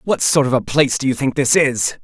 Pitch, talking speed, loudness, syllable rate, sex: 135 Hz, 295 wpm, -16 LUFS, 5.9 syllables/s, male